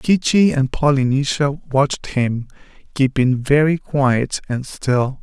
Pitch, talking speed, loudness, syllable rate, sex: 140 Hz, 125 wpm, -18 LUFS, 3.7 syllables/s, male